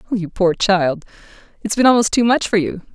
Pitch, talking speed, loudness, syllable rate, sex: 200 Hz, 185 wpm, -16 LUFS, 5.2 syllables/s, female